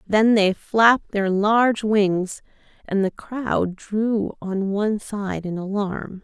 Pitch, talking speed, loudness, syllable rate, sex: 205 Hz, 145 wpm, -21 LUFS, 3.4 syllables/s, female